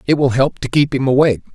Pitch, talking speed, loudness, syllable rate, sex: 130 Hz, 270 wpm, -15 LUFS, 6.9 syllables/s, male